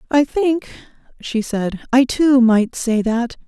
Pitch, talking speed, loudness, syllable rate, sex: 250 Hz, 155 wpm, -17 LUFS, 3.5 syllables/s, female